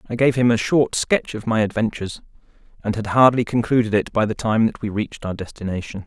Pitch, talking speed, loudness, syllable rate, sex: 110 Hz, 220 wpm, -20 LUFS, 6.0 syllables/s, male